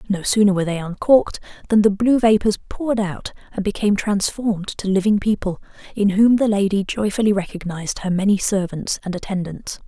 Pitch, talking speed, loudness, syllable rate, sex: 200 Hz, 170 wpm, -19 LUFS, 5.8 syllables/s, female